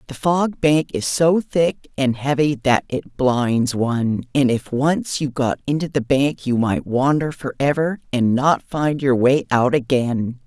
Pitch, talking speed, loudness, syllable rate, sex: 135 Hz, 180 wpm, -19 LUFS, 3.9 syllables/s, female